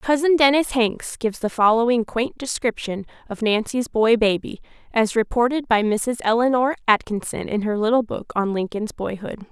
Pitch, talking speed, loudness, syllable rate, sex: 230 Hz, 160 wpm, -21 LUFS, 5.0 syllables/s, female